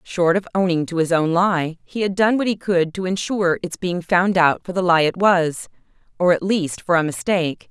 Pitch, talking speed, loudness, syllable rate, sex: 175 Hz, 225 wpm, -19 LUFS, 5.1 syllables/s, female